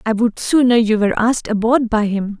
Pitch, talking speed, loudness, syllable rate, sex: 225 Hz, 225 wpm, -16 LUFS, 5.7 syllables/s, female